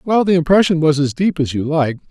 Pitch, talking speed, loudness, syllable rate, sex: 160 Hz, 255 wpm, -15 LUFS, 5.9 syllables/s, male